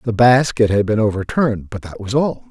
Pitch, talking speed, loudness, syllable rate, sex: 115 Hz, 215 wpm, -16 LUFS, 5.6 syllables/s, male